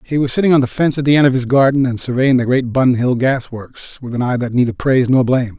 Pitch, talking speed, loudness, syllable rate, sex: 130 Hz, 300 wpm, -15 LUFS, 6.4 syllables/s, male